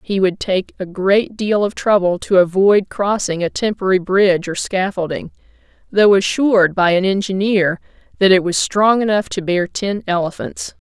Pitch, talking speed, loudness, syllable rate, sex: 195 Hz, 165 wpm, -16 LUFS, 4.8 syllables/s, female